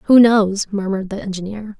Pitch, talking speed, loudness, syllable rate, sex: 205 Hz, 165 wpm, -17 LUFS, 5.2 syllables/s, female